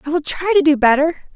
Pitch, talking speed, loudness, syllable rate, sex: 310 Hz, 265 wpm, -15 LUFS, 6.7 syllables/s, female